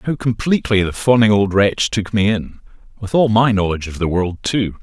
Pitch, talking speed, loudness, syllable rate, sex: 105 Hz, 200 wpm, -16 LUFS, 5.3 syllables/s, male